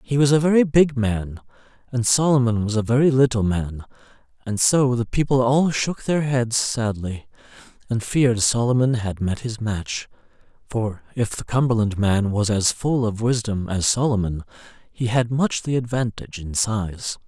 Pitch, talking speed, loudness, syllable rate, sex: 115 Hz, 165 wpm, -21 LUFS, 4.6 syllables/s, male